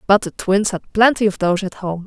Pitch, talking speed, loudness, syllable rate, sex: 195 Hz, 260 wpm, -18 LUFS, 5.8 syllables/s, female